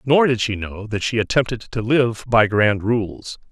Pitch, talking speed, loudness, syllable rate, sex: 115 Hz, 205 wpm, -19 LUFS, 4.3 syllables/s, male